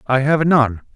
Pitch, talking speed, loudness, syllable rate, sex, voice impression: 140 Hz, 190 wpm, -16 LUFS, 4.2 syllables/s, male, masculine, adult-like, friendly, slightly unique, slightly kind